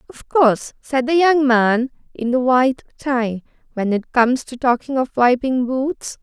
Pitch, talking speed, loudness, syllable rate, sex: 255 Hz, 175 wpm, -18 LUFS, 4.4 syllables/s, female